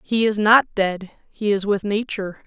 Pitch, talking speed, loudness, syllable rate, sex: 205 Hz, 195 wpm, -20 LUFS, 4.8 syllables/s, female